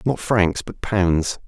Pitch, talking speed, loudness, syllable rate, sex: 100 Hz, 165 wpm, -20 LUFS, 3.1 syllables/s, male